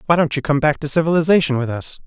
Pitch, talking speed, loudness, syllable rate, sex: 150 Hz, 260 wpm, -17 LUFS, 6.9 syllables/s, male